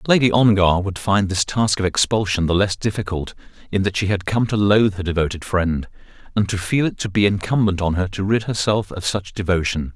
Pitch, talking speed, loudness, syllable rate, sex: 100 Hz, 215 wpm, -19 LUFS, 5.5 syllables/s, male